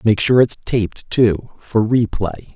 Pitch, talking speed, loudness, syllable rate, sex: 110 Hz, 165 wpm, -17 LUFS, 3.6 syllables/s, male